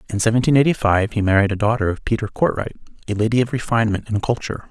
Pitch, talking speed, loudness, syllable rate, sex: 110 Hz, 215 wpm, -19 LUFS, 7.3 syllables/s, male